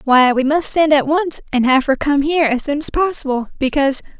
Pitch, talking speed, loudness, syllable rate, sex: 285 Hz, 230 wpm, -16 LUFS, 5.7 syllables/s, female